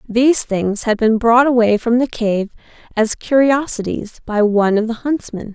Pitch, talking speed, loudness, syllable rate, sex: 230 Hz, 175 wpm, -16 LUFS, 4.6 syllables/s, female